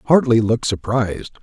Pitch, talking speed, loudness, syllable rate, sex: 115 Hz, 125 wpm, -18 LUFS, 6.1 syllables/s, male